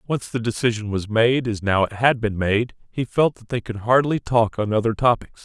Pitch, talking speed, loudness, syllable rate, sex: 115 Hz, 230 wpm, -21 LUFS, 5.1 syllables/s, male